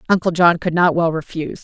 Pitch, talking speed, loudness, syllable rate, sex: 170 Hz, 220 wpm, -17 LUFS, 6.3 syllables/s, female